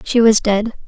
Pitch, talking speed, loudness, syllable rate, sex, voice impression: 220 Hz, 205 wpm, -15 LUFS, 4.6 syllables/s, female, feminine, slightly young, slightly cute, friendly, kind